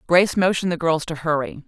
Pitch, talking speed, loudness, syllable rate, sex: 165 Hz, 215 wpm, -21 LUFS, 6.8 syllables/s, female